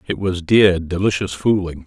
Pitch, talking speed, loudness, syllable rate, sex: 90 Hz, 160 wpm, -18 LUFS, 4.7 syllables/s, male